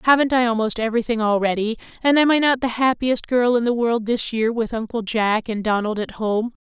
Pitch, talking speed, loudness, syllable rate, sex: 230 Hz, 215 wpm, -20 LUFS, 5.5 syllables/s, female